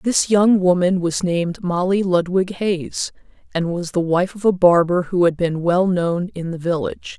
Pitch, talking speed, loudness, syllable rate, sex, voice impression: 180 Hz, 190 wpm, -19 LUFS, 4.6 syllables/s, female, feminine, adult-like, slightly powerful, slightly hard, fluent, intellectual, calm, slightly reassuring, elegant, strict, sharp